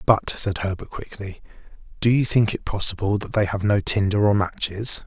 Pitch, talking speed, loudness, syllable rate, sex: 100 Hz, 190 wpm, -21 LUFS, 5.0 syllables/s, male